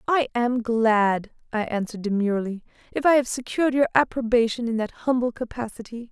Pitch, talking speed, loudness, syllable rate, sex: 235 Hz, 155 wpm, -23 LUFS, 5.7 syllables/s, female